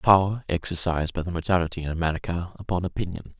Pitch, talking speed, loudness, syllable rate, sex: 85 Hz, 160 wpm, -26 LUFS, 6.7 syllables/s, male